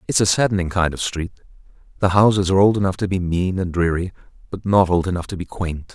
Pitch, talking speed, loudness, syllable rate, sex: 90 Hz, 230 wpm, -19 LUFS, 6.4 syllables/s, male